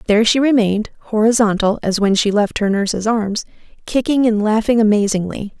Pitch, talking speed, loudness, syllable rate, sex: 215 Hz, 160 wpm, -16 LUFS, 5.7 syllables/s, female